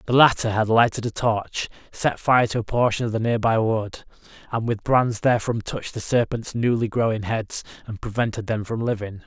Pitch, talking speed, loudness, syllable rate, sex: 115 Hz, 195 wpm, -22 LUFS, 5.3 syllables/s, male